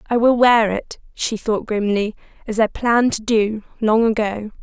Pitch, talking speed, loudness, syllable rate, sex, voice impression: 225 Hz, 180 wpm, -18 LUFS, 4.6 syllables/s, female, feminine, adult-like, intellectual, slightly strict